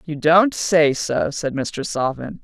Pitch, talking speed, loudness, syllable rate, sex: 155 Hz, 175 wpm, -19 LUFS, 3.5 syllables/s, female